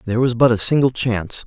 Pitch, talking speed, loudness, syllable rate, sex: 120 Hz, 245 wpm, -17 LUFS, 6.8 syllables/s, male